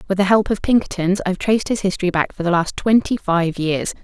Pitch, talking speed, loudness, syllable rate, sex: 190 Hz, 240 wpm, -18 LUFS, 6.2 syllables/s, female